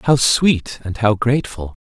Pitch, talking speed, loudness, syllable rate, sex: 120 Hz, 165 wpm, -17 LUFS, 4.1 syllables/s, male